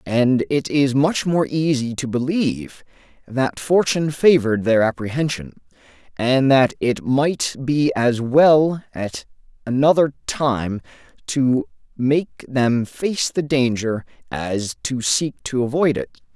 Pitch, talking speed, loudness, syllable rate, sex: 130 Hz, 130 wpm, -19 LUFS, 3.8 syllables/s, male